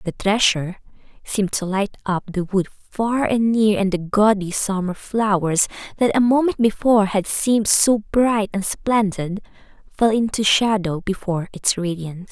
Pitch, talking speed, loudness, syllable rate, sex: 205 Hz, 155 wpm, -19 LUFS, 4.6 syllables/s, female